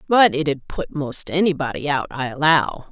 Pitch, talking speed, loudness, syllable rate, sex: 150 Hz, 165 wpm, -20 LUFS, 4.5 syllables/s, female